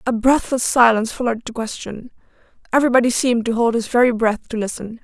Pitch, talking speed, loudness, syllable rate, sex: 235 Hz, 165 wpm, -18 LUFS, 6.6 syllables/s, female